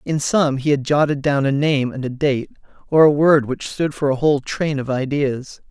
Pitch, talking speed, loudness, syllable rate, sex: 140 Hz, 230 wpm, -18 LUFS, 4.8 syllables/s, male